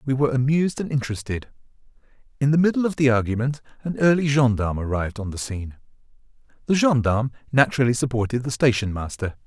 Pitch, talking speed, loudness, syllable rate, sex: 130 Hz, 160 wpm, -22 LUFS, 6.9 syllables/s, male